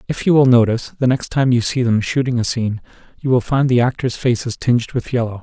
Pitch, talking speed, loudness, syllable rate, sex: 125 Hz, 245 wpm, -17 LUFS, 6.2 syllables/s, male